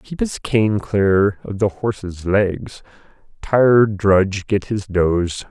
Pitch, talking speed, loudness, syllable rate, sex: 100 Hz, 140 wpm, -18 LUFS, 3.6 syllables/s, male